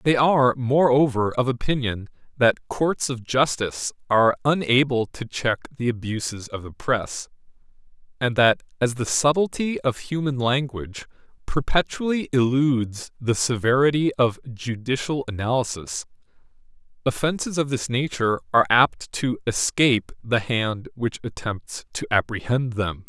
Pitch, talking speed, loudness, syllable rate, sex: 125 Hz, 125 wpm, -23 LUFS, 4.6 syllables/s, male